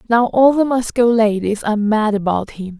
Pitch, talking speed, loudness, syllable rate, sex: 220 Hz, 195 wpm, -16 LUFS, 5.0 syllables/s, female